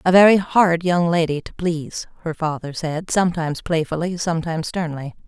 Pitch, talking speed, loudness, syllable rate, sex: 165 Hz, 160 wpm, -20 LUFS, 5.5 syllables/s, female